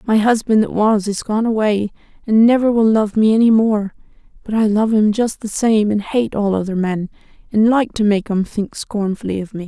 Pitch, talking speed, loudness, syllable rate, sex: 215 Hz, 215 wpm, -16 LUFS, 5.0 syllables/s, female